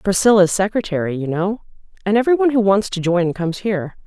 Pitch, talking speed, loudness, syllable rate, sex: 195 Hz, 190 wpm, -18 LUFS, 6.7 syllables/s, female